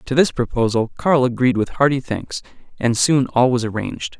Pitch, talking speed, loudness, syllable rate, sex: 125 Hz, 185 wpm, -18 LUFS, 5.2 syllables/s, male